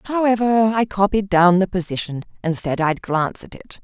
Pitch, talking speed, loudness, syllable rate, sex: 190 Hz, 190 wpm, -19 LUFS, 5.0 syllables/s, female